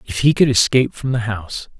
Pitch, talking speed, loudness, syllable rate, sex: 120 Hz, 235 wpm, -17 LUFS, 6.3 syllables/s, male